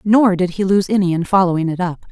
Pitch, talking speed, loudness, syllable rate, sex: 185 Hz, 255 wpm, -16 LUFS, 6.1 syllables/s, female